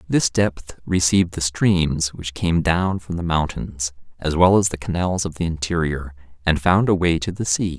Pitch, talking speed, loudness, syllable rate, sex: 85 Hz, 200 wpm, -20 LUFS, 4.5 syllables/s, male